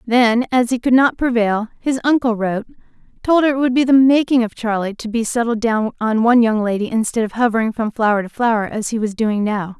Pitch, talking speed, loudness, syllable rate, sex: 230 Hz, 235 wpm, -17 LUFS, 5.8 syllables/s, female